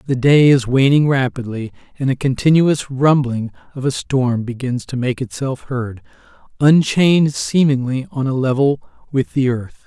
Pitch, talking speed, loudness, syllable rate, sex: 130 Hz, 150 wpm, -17 LUFS, 4.6 syllables/s, male